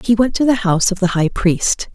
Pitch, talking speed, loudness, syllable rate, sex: 205 Hz, 275 wpm, -16 LUFS, 5.5 syllables/s, female